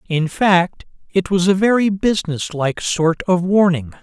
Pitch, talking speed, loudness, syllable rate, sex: 180 Hz, 165 wpm, -17 LUFS, 4.2 syllables/s, male